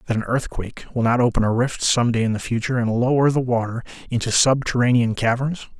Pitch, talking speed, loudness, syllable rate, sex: 120 Hz, 185 wpm, -20 LUFS, 6.1 syllables/s, male